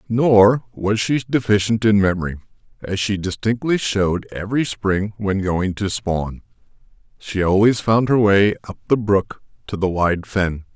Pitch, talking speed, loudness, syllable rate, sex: 105 Hz, 155 wpm, -19 LUFS, 4.4 syllables/s, male